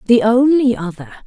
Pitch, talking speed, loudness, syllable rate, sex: 230 Hz, 145 wpm, -14 LUFS, 5.3 syllables/s, female